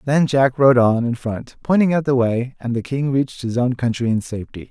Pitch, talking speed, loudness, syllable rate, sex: 125 Hz, 240 wpm, -19 LUFS, 5.4 syllables/s, male